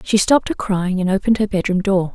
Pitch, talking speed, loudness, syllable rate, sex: 195 Hz, 250 wpm, -18 LUFS, 6.3 syllables/s, female